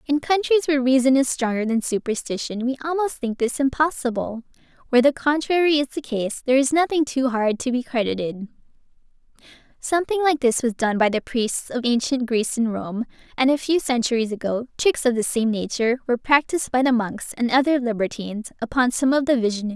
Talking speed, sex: 205 wpm, female